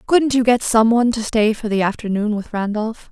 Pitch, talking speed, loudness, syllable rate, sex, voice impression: 225 Hz, 230 wpm, -18 LUFS, 5.4 syllables/s, female, very feminine, slightly young, slightly adult-like, slightly thin, very tensed, slightly powerful, bright, hard, very clear, fluent, cute, intellectual, slightly refreshing, sincere, calm, friendly, reassuring, slightly unique, slightly wild, lively, slightly strict, slightly intense